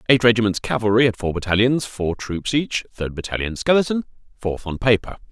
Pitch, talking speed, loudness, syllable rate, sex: 110 Hz, 170 wpm, -20 LUFS, 5.6 syllables/s, male